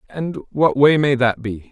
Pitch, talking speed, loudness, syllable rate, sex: 135 Hz, 210 wpm, -17 LUFS, 4.3 syllables/s, male